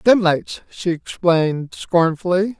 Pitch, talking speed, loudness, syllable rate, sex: 175 Hz, 90 wpm, -19 LUFS, 4.1 syllables/s, male